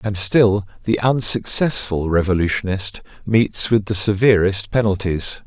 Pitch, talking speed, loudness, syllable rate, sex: 105 Hz, 110 wpm, -18 LUFS, 4.3 syllables/s, male